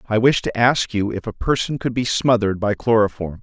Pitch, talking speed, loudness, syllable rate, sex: 110 Hz, 230 wpm, -19 LUFS, 5.4 syllables/s, male